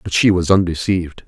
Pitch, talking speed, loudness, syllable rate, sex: 90 Hz, 190 wpm, -16 LUFS, 6.0 syllables/s, male